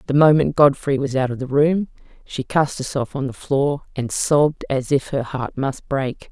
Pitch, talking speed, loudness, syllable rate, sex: 140 Hz, 210 wpm, -20 LUFS, 4.6 syllables/s, female